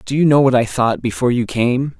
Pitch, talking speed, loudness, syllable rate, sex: 125 Hz, 270 wpm, -16 LUFS, 5.8 syllables/s, male